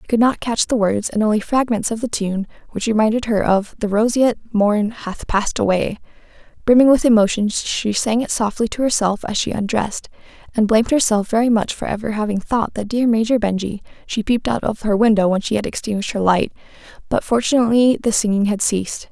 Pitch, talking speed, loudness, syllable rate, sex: 220 Hz, 200 wpm, -18 LUFS, 6.0 syllables/s, female